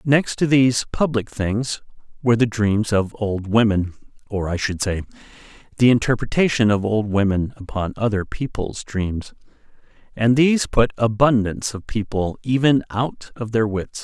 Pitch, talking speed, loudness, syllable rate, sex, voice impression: 110 Hz, 150 wpm, -20 LUFS, 4.7 syllables/s, male, masculine, adult-like, cool, slightly refreshing, sincere, slightly elegant